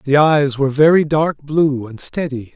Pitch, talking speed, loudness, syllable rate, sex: 145 Hz, 190 wpm, -16 LUFS, 4.4 syllables/s, male